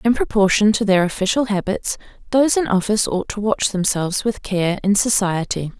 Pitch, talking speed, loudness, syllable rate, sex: 205 Hz, 175 wpm, -18 LUFS, 5.5 syllables/s, female